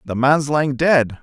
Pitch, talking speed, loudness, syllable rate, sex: 140 Hz, 195 wpm, -17 LUFS, 4.5 syllables/s, male